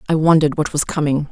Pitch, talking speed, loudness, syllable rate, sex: 150 Hz, 230 wpm, -17 LUFS, 7.1 syllables/s, female